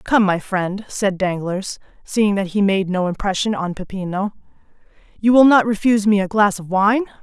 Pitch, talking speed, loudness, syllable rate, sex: 200 Hz, 185 wpm, -18 LUFS, 4.9 syllables/s, female